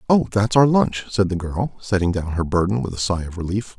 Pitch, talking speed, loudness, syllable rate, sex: 100 Hz, 255 wpm, -20 LUFS, 5.6 syllables/s, male